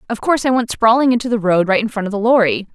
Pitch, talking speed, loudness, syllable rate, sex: 220 Hz, 305 wpm, -15 LUFS, 7.1 syllables/s, female